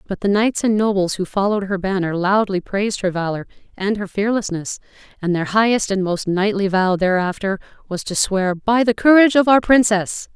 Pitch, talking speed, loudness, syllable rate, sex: 200 Hz, 190 wpm, -18 LUFS, 5.4 syllables/s, female